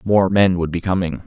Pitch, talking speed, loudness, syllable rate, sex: 90 Hz, 235 wpm, -18 LUFS, 5.1 syllables/s, male